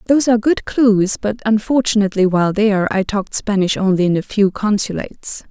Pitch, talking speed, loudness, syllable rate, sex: 210 Hz, 175 wpm, -16 LUFS, 6.0 syllables/s, female